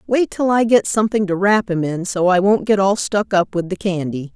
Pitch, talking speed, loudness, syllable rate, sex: 195 Hz, 260 wpm, -17 LUFS, 5.2 syllables/s, female